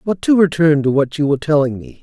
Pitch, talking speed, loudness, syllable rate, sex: 155 Hz, 265 wpm, -15 LUFS, 6.2 syllables/s, male